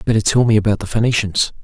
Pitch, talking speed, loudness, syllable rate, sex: 110 Hz, 220 wpm, -16 LUFS, 6.9 syllables/s, male